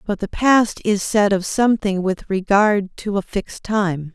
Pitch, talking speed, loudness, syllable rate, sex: 200 Hz, 190 wpm, -19 LUFS, 4.2 syllables/s, female